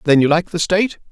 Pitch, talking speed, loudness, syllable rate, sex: 170 Hz, 270 wpm, -16 LUFS, 6.6 syllables/s, male